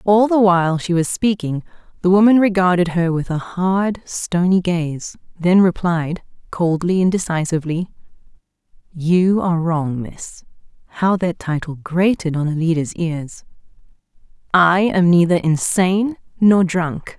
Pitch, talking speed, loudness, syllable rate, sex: 175 Hz, 120 wpm, -17 LUFS, 4.3 syllables/s, female